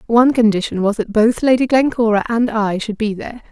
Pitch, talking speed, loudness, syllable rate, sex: 225 Hz, 205 wpm, -16 LUFS, 5.8 syllables/s, female